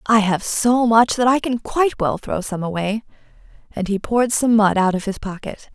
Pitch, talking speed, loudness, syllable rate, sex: 220 Hz, 220 wpm, -19 LUFS, 5.0 syllables/s, female